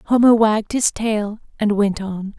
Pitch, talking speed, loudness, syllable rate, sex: 215 Hz, 175 wpm, -18 LUFS, 4.2 syllables/s, female